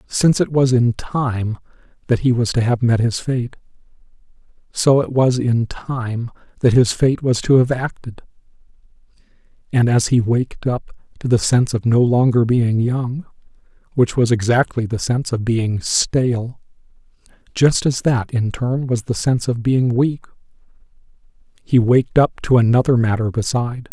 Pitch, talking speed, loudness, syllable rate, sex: 120 Hz, 160 wpm, -17 LUFS, 4.7 syllables/s, male